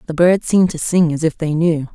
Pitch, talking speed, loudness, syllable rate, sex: 165 Hz, 280 wpm, -16 LUFS, 5.1 syllables/s, female